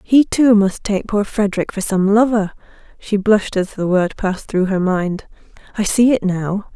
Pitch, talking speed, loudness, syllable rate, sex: 200 Hz, 195 wpm, -17 LUFS, 3.4 syllables/s, female